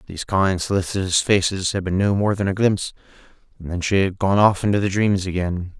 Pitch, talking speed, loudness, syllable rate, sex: 95 Hz, 215 wpm, -20 LUFS, 5.9 syllables/s, male